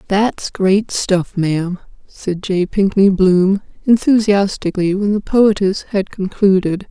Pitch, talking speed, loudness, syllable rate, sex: 195 Hz, 120 wpm, -15 LUFS, 3.9 syllables/s, female